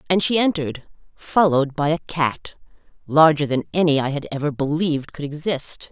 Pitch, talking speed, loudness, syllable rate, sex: 150 Hz, 160 wpm, -20 LUFS, 5.4 syllables/s, female